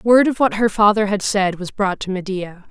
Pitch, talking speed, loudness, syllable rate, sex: 205 Hz, 245 wpm, -18 LUFS, 4.9 syllables/s, female